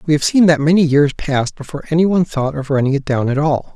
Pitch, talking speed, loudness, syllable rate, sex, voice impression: 150 Hz, 270 wpm, -15 LUFS, 6.8 syllables/s, male, masculine, adult-like, tensed, bright, clear, intellectual, calm, friendly, lively, kind, slightly light